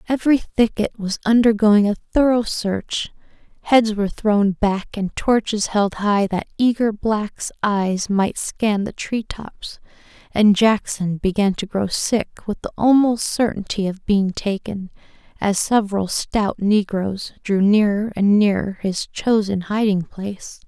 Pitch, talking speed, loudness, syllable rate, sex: 205 Hz, 140 wpm, -19 LUFS, 4.0 syllables/s, female